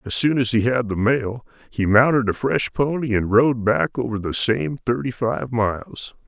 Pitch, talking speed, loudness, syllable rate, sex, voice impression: 115 Hz, 200 wpm, -20 LUFS, 4.5 syllables/s, male, very masculine, old, thick, sincere, calm, mature, wild